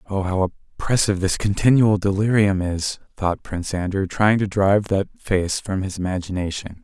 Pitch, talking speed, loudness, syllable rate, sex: 95 Hz, 160 wpm, -21 LUFS, 5.2 syllables/s, male